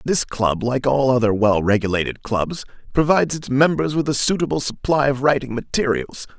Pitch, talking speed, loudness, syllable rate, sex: 130 Hz, 170 wpm, -19 LUFS, 5.3 syllables/s, male